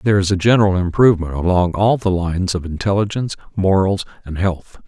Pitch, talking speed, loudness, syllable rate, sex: 95 Hz, 170 wpm, -17 LUFS, 6.3 syllables/s, male